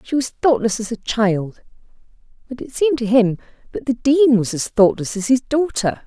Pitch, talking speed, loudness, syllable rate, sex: 230 Hz, 190 wpm, -18 LUFS, 5.0 syllables/s, female